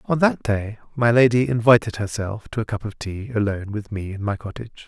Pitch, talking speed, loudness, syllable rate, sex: 110 Hz, 220 wpm, -21 LUFS, 5.7 syllables/s, male